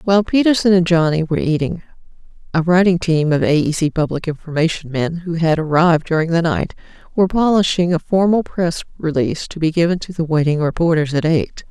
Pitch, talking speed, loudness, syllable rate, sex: 165 Hz, 190 wpm, -17 LUFS, 5.9 syllables/s, female